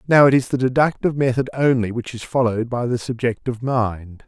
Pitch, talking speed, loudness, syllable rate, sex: 125 Hz, 195 wpm, -20 LUFS, 5.9 syllables/s, male